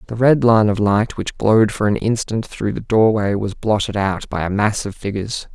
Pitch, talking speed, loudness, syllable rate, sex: 105 Hz, 225 wpm, -18 LUFS, 5.1 syllables/s, male